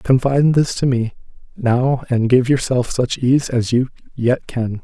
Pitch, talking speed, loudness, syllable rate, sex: 125 Hz, 175 wpm, -17 LUFS, 4.2 syllables/s, male